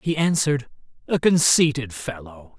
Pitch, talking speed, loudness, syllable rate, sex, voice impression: 135 Hz, 115 wpm, -20 LUFS, 4.7 syllables/s, male, masculine, adult-like, slightly powerful, slightly friendly, slightly unique